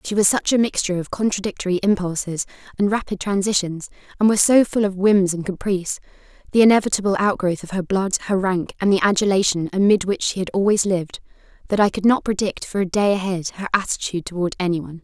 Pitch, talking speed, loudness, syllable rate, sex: 190 Hz, 200 wpm, -20 LUFS, 6.3 syllables/s, female